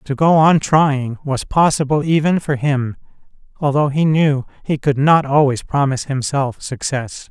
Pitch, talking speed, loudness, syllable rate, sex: 145 Hz, 155 wpm, -16 LUFS, 4.4 syllables/s, male